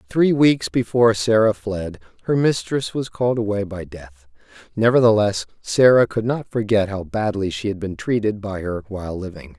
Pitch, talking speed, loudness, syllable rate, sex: 105 Hz, 170 wpm, -20 LUFS, 5.0 syllables/s, male